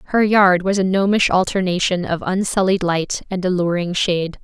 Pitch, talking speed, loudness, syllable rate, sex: 185 Hz, 160 wpm, -18 LUFS, 5.2 syllables/s, female